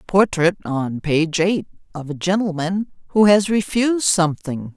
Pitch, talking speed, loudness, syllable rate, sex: 180 Hz, 140 wpm, -19 LUFS, 4.5 syllables/s, female